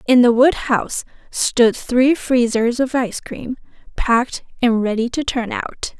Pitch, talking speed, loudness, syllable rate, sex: 245 Hz, 150 wpm, -18 LUFS, 4.3 syllables/s, female